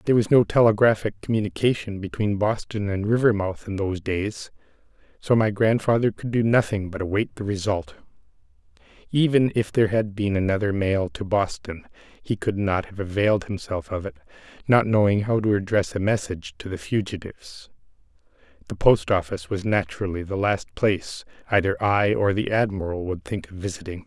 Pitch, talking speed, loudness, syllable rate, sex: 105 Hz, 165 wpm, -23 LUFS, 5.5 syllables/s, male